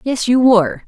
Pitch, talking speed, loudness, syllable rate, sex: 225 Hz, 205 wpm, -13 LUFS, 5.3 syllables/s, female